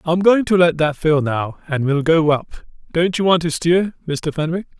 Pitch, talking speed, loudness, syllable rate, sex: 165 Hz, 225 wpm, -17 LUFS, 4.6 syllables/s, male